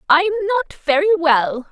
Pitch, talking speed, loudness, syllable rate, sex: 345 Hz, 140 wpm, -17 LUFS, 5.7 syllables/s, female